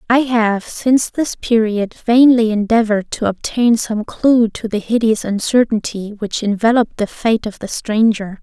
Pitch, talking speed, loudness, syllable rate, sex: 225 Hz, 155 wpm, -16 LUFS, 4.5 syllables/s, female